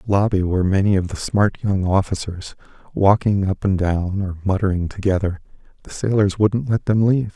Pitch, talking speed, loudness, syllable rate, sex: 100 Hz, 190 wpm, -19 LUFS, 5.5 syllables/s, male